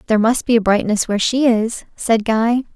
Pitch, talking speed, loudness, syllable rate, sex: 225 Hz, 195 wpm, -17 LUFS, 5.1 syllables/s, female